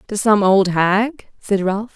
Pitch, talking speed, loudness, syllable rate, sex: 205 Hz, 185 wpm, -17 LUFS, 3.5 syllables/s, female